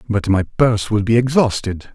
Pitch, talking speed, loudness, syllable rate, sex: 110 Hz, 185 wpm, -17 LUFS, 5.1 syllables/s, male